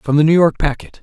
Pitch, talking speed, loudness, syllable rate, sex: 155 Hz, 295 wpm, -14 LUFS, 6.4 syllables/s, male